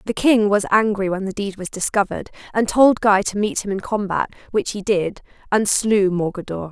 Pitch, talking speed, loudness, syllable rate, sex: 200 Hz, 205 wpm, -19 LUFS, 5.2 syllables/s, female